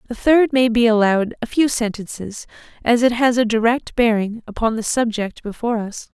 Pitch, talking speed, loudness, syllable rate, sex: 230 Hz, 185 wpm, -18 LUFS, 5.3 syllables/s, female